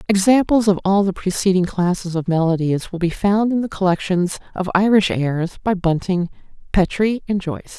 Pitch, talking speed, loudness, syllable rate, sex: 190 Hz, 170 wpm, -19 LUFS, 5.1 syllables/s, female